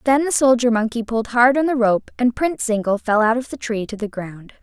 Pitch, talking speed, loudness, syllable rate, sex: 235 Hz, 260 wpm, -19 LUFS, 5.7 syllables/s, female